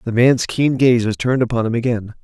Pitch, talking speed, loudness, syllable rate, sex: 120 Hz, 240 wpm, -17 LUFS, 5.9 syllables/s, male